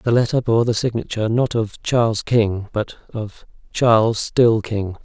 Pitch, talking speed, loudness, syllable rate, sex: 115 Hz, 155 wpm, -19 LUFS, 4.5 syllables/s, male